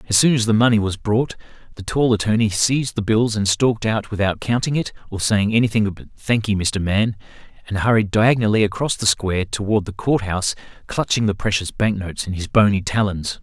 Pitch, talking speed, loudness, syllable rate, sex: 105 Hz, 195 wpm, -19 LUFS, 5.7 syllables/s, male